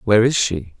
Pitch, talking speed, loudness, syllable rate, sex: 105 Hz, 225 wpm, -17 LUFS, 6.0 syllables/s, male